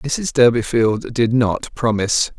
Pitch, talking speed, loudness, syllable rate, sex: 120 Hz, 125 wpm, -17 LUFS, 3.9 syllables/s, male